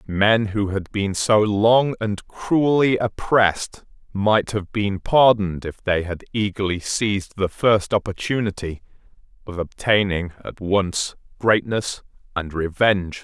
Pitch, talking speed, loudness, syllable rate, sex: 100 Hz, 125 wpm, -21 LUFS, 3.9 syllables/s, male